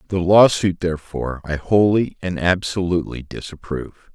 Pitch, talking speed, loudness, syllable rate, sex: 90 Hz, 130 wpm, -19 LUFS, 5.3 syllables/s, male